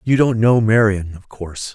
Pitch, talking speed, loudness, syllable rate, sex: 110 Hz, 170 wpm, -16 LUFS, 5.0 syllables/s, male